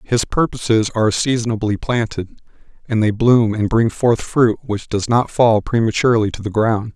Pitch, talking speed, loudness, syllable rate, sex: 115 Hz, 170 wpm, -17 LUFS, 4.9 syllables/s, male